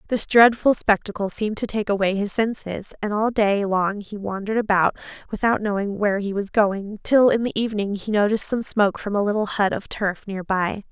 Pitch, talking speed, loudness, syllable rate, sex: 205 Hz, 210 wpm, -21 LUFS, 5.5 syllables/s, female